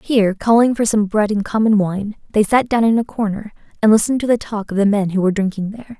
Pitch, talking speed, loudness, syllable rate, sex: 210 Hz, 260 wpm, -17 LUFS, 6.5 syllables/s, female